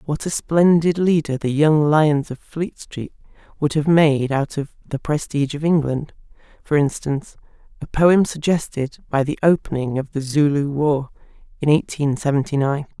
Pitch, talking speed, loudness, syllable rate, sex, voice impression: 150 Hz, 160 wpm, -19 LUFS, 4.7 syllables/s, female, very feminine, very adult-like, slightly middle-aged, slightly thin, slightly tensed, slightly weak, slightly dark, soft, slightly clear, slightly fluent, cute, slightly cool, intellectual, slightly refreshing, sincere, very calm, friendly, slightly reassuring, unique, elegant, slightly wild, sweet, slightly lively, very kind, slightly modest